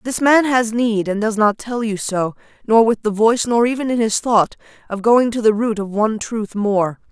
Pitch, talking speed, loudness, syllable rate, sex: 220 Hz, 235 wpm, -17 LUFS, 4.2 syllables/s, female